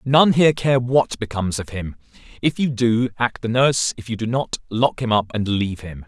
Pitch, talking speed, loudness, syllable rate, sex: 120 Hz, 225 wpm, -20 LUFS, 5.4 syllables/s, male